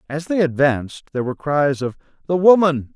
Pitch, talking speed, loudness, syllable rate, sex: 150 Hz, 185 wpm, -18 LUFS, 5.9 syllables/s, male